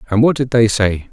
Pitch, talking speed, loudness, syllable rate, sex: 115 Hz, 270 wpm, -15 LUFS, 5.6 syllables/s, male